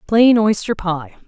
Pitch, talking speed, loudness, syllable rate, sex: 210 Hz, 140 wpm, -16 LUFS, 3.7 syllables/s, female